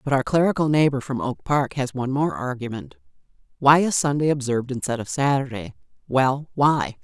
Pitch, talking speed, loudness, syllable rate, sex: 140 Hz, 170 wpm, -22 LUFS, 5.5 syllables/s, female